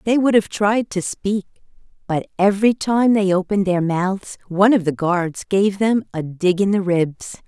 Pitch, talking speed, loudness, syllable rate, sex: 195 Hz, 195 wpm, -19 LUFS, 4.5 syllables/s, female